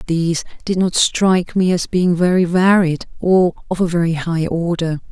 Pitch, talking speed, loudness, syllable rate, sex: 175 Hz, 175 wpm, -16 LUFS, 4.8 syllables/s, female